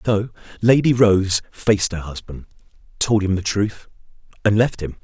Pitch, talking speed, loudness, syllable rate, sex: 100 Hz, 155 wpm, -19 LUFS, 4.7 syllables/s, male